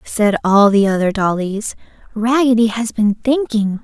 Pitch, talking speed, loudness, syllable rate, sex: 220 Hz, 155 wpm, -15 LUFS, 4.5 syllables/s, female